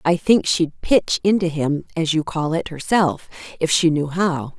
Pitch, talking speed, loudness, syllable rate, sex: 165 Hz, 195 wpm, -19 LUFS, 4.2 syllables/s, female